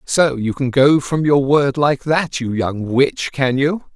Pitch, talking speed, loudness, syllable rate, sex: 140 Hz, 210 wpm, -17 LUFS, 3.7 syllables/s, male